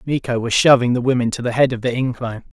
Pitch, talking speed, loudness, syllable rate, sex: 125 Hz, 255 wpm, -18 LUFS, 6.8 syllables/s, male